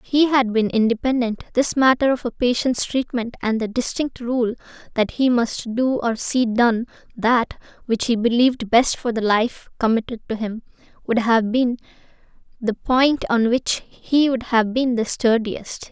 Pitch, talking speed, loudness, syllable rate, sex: 235 Hz, 175 wpm, -20 LUFS, 4.4 syllables/s, female